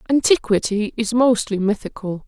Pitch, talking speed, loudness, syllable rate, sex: 220 Hz, 105 wpm, -19 LUFS, 4.9 syllables/s, female